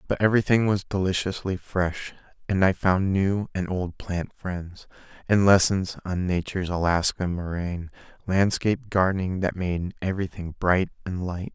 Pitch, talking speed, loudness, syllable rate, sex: 95 Hz, 140 wpm, -25 LUFS, 4.8 syllables/s, male